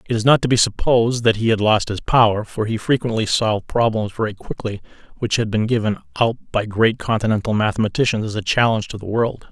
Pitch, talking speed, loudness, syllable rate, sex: 110 Hz, 215 wpm, -19 LUFS, 6.1 syllables/s, male